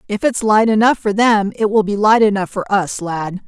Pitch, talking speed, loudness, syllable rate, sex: 205 Hz, 240 wpm, -15 LUFS, 5.1 syllables/s, female